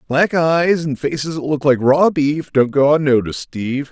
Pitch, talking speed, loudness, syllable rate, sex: 145 Hz, 200 wpm, -16 LUFS, 5.1 syllables/s, male